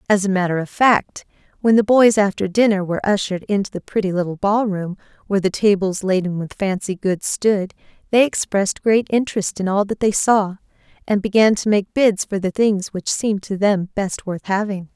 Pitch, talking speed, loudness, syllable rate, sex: 200 Hz, 195 wpm, -19 LUFS, 5.3 syllables/s, female